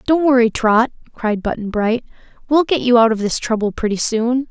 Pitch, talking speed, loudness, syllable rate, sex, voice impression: 235 Hz, 200 wpm, -17 LUFS, 5.1 syllables/s, female, feminine, adult-like, tensed, bright, soft, fluent, intellectual, friendly, reassuring, elegant, lively, slightly sharp